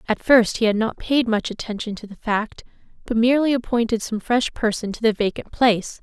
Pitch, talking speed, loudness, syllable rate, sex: 225 Hz, 210 wpm, -21 LUFS, 5.5 syllables/s, female